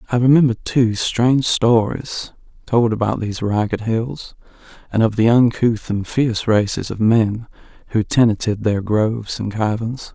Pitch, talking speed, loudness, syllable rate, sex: 115 Hz, 150 wpm, -18 LUFS, 4.7 syllables/s, male